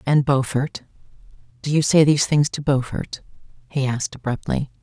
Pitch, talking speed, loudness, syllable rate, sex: 140 Hz, 135 wpm, -21 LUFS, 5.3 syllables/s, female